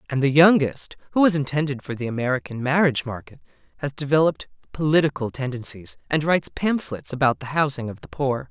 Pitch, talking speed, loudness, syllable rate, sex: 135 Hz, 170 wpm, -22 LUFS, 6.1 syllables/s, male